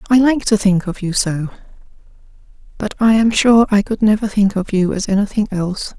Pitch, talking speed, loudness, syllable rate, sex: 205 Hz, 200 wpm, -16 LUFS, 5.5 syllables/s, female